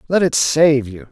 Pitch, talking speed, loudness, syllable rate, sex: 140 Hz, 215 wpm, -15 LUFS, 4.3 syllables/s, male